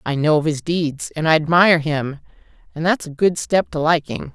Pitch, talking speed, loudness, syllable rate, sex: 160 Hz, 220 wpm, -18 LUFS, 5.1 syllables/s, female